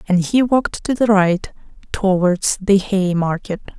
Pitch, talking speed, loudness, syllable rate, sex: 195 Hz, 160 wpm, -17 LUFS, 4.2 syllables/s, female